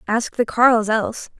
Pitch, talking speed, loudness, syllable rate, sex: 230 Hz, 170 wpm, -18 LUFS, 5.1 syllables/s, female